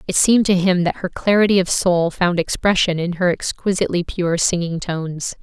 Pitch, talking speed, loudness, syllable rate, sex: 180 Hz, 190 wpm, -18 LUFS, 5.4 syllables/s, female